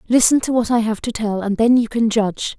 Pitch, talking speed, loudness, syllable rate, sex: 225 Hz, 280 wpm, -17 LUFS, 5.8 syllables/s, female